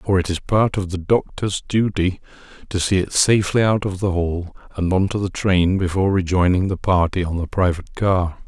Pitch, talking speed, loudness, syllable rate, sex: 95 Hz, 200 wpm, -20 LUFS, 5.2 syllables/s, male